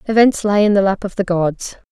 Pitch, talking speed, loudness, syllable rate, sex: 200 Hz, 250 wpm, -16 LUFS, 5.4 syllables/s, female